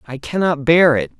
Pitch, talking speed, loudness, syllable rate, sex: 140 Hz, 200 wpm, -15 LUFS, 5.0 syllables/s, male